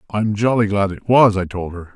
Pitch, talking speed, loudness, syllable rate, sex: 105 Hz, 245 wpm, -17 LUFS, 5.4 syllables/s, male